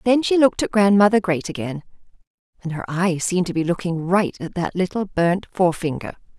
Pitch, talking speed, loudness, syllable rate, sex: 180 Hz, 190 wpm, -20 LUFS, 5.7 syllables/s, female